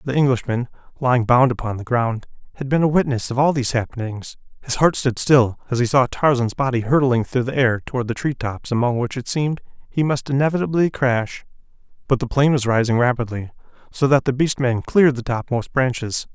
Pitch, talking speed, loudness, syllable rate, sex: 125 Hz, 205 wpm, -19 LUFS, 5.8 syllables/s, male